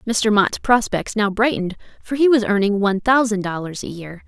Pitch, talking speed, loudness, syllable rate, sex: 210 Hz, 195 wpm, -18 LUFS, 5.4 syllables/s, female